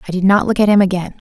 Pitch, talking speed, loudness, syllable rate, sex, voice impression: 195 Hz, 330 wpm, -14 LUFS, 7.7 syllables/s, female, very feminine, slightly young, slightly adult-like, very thin, very tensed, very powerful, very bright, slightly hard, very clear, very fluent, very cute, intellectual, very refreshing, sincere, calm, friendly, very reassuring, very unique, elegant, very sweet, lively, kind, slightly intense